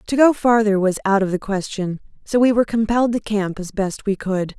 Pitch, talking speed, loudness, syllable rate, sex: 210 Hz, 235 wpm, -19 LUFS, 5.6 syllables/s, female